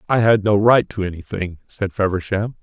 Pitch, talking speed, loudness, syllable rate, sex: 100 Hz, 185 wpm, -19 LUFS, 5.1 syllables/s, male